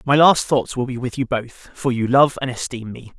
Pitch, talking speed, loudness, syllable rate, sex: 130 Hz, 265 wpm, -19 LUFS, 5.0 syllables/s, male